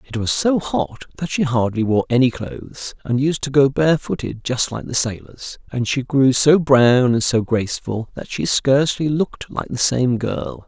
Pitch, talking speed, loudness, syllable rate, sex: 130 Hz, 195 wpm, -19 LUFS, 4.7 syllables/s, male